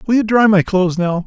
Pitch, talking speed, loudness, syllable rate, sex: 195 Hz, 285 wpm, -14 LUFS, 6.1 syllables/s, male